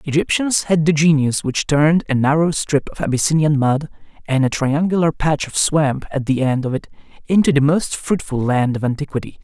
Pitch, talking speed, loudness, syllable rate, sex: 150 Hz, 190 wpm, -17 LUFS, 5.3 syllables/s, male